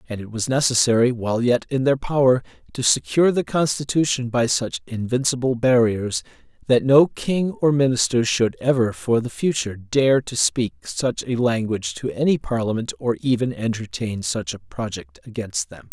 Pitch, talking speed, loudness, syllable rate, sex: 120 Hz, 165 wpm, -21 LUFS, 4.9 syllables/s, male